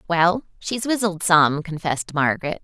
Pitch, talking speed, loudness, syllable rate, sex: 175 Hz, 135 wpm, -21 LUFS, 4.8 syllables/s, female